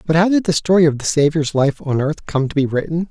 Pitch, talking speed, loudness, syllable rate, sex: 155 Hz, 290 wpm, -17 LUFS, 6.0 syllables/s, male